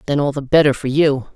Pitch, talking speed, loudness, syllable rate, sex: 140 Hz, 265 wpm, -16 LUFS, 6.0 syllables/s, female